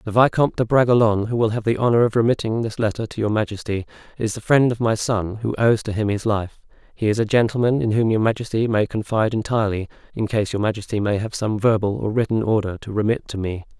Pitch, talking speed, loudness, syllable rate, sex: 110 Hz, 235 wpm, -20 LUFS, 6.4 syllables/s, male